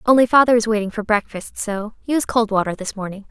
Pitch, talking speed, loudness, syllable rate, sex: 220 Hz, 220 wpm, -19 LUFS, 6.2 syllables/s, female